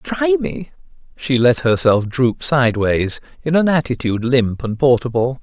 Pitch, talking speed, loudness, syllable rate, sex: 135 Hz, 145 wpm, -17 LUFS, 4.5 syllables/s, male